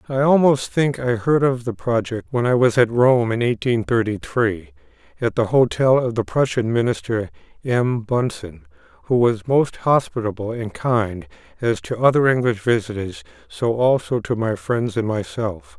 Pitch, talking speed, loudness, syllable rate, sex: 120 Hz, 165 wpm, -20 LUFS, 4.5 syllables/s, male